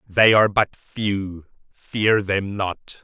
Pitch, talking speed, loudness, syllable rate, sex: 100 Hz, 140 wpm, -20 LUFS, 3.0 syllables/s, male